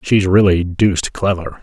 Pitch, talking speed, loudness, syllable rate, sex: 95 Hz, 150 wpm, -15 LUFS, 4.6 syllables/s, male